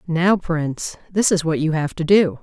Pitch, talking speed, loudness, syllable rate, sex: 165 Hz, 225 wpm, -19 LUFS, 4.6 syllables/s, female